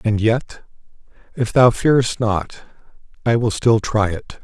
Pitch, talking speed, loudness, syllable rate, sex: 115 Hz, 150 wpm, -18 LUFS, 3.3 syllables/s, male